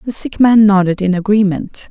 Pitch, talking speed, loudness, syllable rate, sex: 205 Hz, 190 wpm, -12 LUFS, 5.0 syllables/s, female